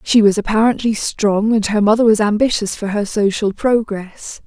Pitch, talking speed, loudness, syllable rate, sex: 210 Hz, 175 wpm, -16 LUFS, 4.8 syllables/s, female